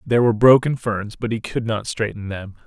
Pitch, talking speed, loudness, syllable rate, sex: 110 Hz, 225 wpm, -20 LUFS, 5.7 syllables/s, male